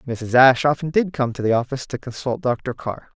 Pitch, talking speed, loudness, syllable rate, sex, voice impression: 130 Hz, 225 wpm, -20 LUFS, 5.7 syllables/s, male, masculine, young, slightly adult-like, slightly thick, slightly tensed, weak, slightly dark, soft, clear, fluent, slightly raspy, cool, slightly intellectual, very refreshing, very sincere, calm, friendly, reassuring, slightly unique, slightly elegant, slightly wild, slightly sweet, slightly lively, kind, very modest, slightly light